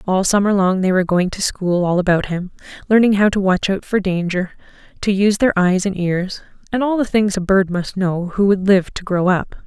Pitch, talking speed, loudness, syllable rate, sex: 190 Hz, 235 wpm, -17 LUFS, 5.3 syllables/s, female